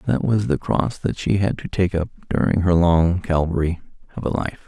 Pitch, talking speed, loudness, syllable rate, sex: 90 Hz, 220 wpm, -21 LUFS, 5.1 syllables/s, male